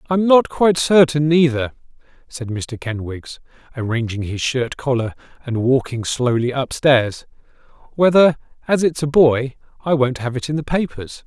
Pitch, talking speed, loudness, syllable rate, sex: 135 Hz, 150 wpm, -18 LUFS, 4.6 syllables/s, male